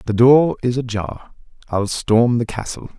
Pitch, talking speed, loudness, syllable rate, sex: 115 Hz, 160 wpm, -17 LUFS, 4.2 syllables/s, male